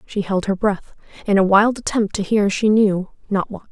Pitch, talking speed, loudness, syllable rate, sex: 205 Hz, 225 wpm, -18 LUFS, 4.9 syllables/s, female